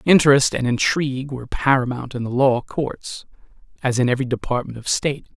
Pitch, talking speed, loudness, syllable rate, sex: 130 Hz, 165 wpm, -20 LUFS, 5.8 syllables/s, male